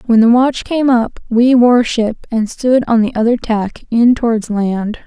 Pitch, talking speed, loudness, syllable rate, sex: 230 Hz, 200 wpm, -13 LUFS, 4.1 syllables/s, female